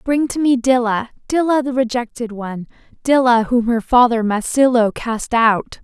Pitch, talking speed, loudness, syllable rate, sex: 240 Hz, 155 wpm, -16 LUFS, 4.7 syllables/s, female